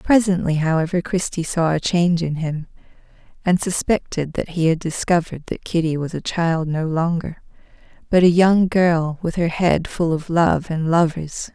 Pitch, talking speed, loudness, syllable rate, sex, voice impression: 165 Hz, 170 wpm, -20 LUFS, 4.7 syllables/s, female, feminine, middle-aged, tensed, intellectual, calm, reassuring, elegant, lively, slightly strict